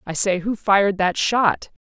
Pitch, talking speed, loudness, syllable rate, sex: 200 Hz, 195 wpm, -19 LUFS, 4.3 syllables/s, female